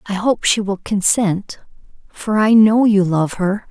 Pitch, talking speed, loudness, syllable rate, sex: 205 Hz, 180 wpm, -16 LUFS, 3.8 syllables/s, female